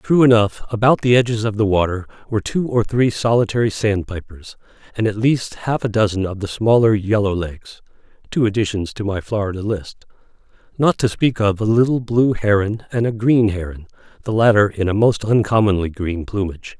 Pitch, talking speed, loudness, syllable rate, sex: 105 Hz, 170 wpm, -18 LUFS, 5.3 syllables/s, male